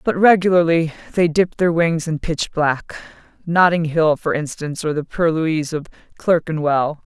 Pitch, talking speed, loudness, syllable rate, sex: 160 Hz, 150 wpm, -18 LUFS, 4.7 syllables/s, female